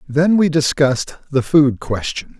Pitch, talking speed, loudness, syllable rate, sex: 150 Hz, 150 wpm, -16 LUFS, 4.3 syllables/s, male